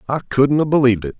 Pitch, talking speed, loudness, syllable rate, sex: 130 Hz, 250 wpm, -16 LUFS, 7.7 syllables/s, male